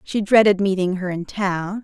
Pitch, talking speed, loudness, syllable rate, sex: 195 Hz, 195 wpm, -19 LUFS, 4.6 syllables/s, female